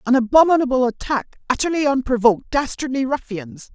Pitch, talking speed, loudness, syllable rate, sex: 255 Hz, 110 wpm, -19 LUFS, 6.1 syllables/s, female